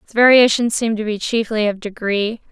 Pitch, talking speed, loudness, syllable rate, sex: 220 Hz, 190 wpm, -16 LUFS, 5.0 syllables/s, female